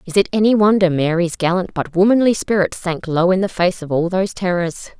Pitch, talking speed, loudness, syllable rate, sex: 185 Hz, 215 wpm, -17 LUFS, 5.7 syllables/s, female